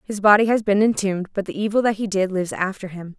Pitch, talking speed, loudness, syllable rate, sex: 200 Hz, 265 wpm, -20 LUFS, 6.6 syllables/s, female